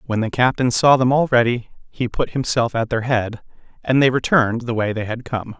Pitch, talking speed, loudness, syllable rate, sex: 120 Hz, 225 wpm, -19 LUFS, 5.4 syllables/s, male